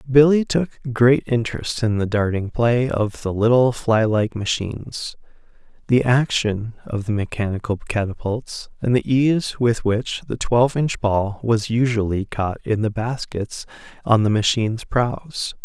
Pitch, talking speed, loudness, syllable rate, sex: 115 Hz, 145 wpm, -20 LUFS, 4.3 syllables/s, male